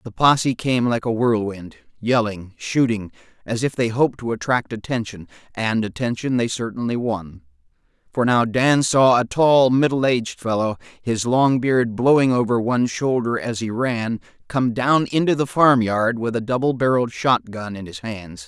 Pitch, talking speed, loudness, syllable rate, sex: 120 Hz, 170 wpm, -20 LUFS, 4.7 syllables/s, male